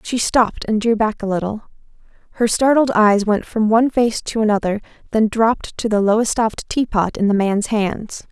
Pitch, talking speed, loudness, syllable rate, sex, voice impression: 220 Hz, 190 wpm, -17 LUFS, 5.1 syllables/s, female, very feminine, young, slightly adult-like, very thin, tensed, slightly weak, bright, slightly hard, clear, fluent, cute, slightly cool, very intellectual, refreshing, very sincere, slightly calm, friendly, very reassuring, slightly unique, elegant, slightly wild, sweet, lively, slightly strict, slightly intense